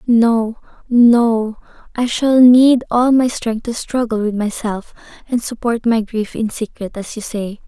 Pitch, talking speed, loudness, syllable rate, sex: 230 Hz, 165 wpm, -16 LUFS, 3.9 syllables/s, female